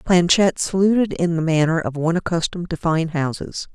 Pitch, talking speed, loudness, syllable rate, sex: 170 Hz, 175 wpm, -19 LUFS, 5.5 syllables/s, female